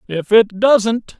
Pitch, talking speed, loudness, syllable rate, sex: 210 Hz, 150 wpm, -14 LUFS, 2.9 syllables/s, male